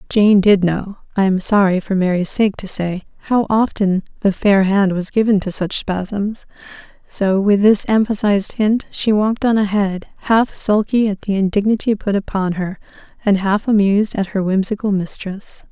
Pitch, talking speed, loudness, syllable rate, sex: 200 Hz, 170 wpm, -17 LUFS, 4.7 syllables/s, female